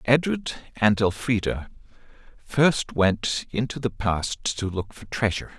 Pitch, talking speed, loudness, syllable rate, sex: 115 Hz, 130 wpm, -24 LUFS, 3.8 syllables/s, male